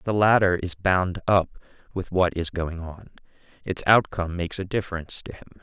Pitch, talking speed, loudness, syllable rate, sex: 90 Hz, 180 wpm, -24 LUFS, 5.6 syllables/s, male